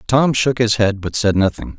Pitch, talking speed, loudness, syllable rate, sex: 110 Hz, 235 wpm, -17 LUFS, 4.9 syllables/s, male